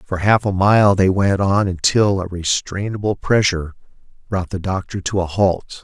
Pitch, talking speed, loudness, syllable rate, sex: 95 Hz, 175 wpm, -18 LUFS, 4.6 syllables/s, male